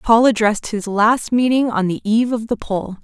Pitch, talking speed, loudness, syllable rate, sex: 225 Hz, 215 wpm, -17 LUFS, 5.2 syllables/s, female